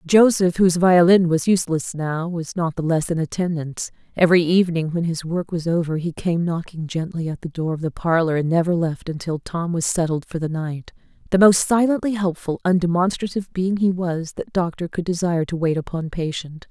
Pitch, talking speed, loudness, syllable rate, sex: 170 Hz, 200 wpm, -21 LUFS, 5.5 syllables/s, female